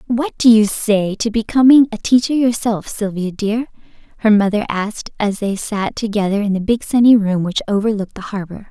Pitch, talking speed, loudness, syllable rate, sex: 215 Hz, 185 wpm, -16 LUFS, 5.3 syllables/s, female